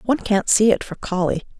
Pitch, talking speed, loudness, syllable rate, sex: 205 Hz, 225 wpm, -19 LUFS, 5.8 syllables/s, female